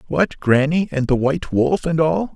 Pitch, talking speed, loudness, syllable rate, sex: 150 Hz, 205 wpm, -18 LUFS, 4.7 syllables/s, male